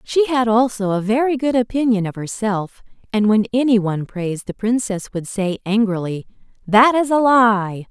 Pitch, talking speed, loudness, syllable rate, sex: 220 Hz, 175 wpm, -18 LUFS, 4.9 syllables/s, female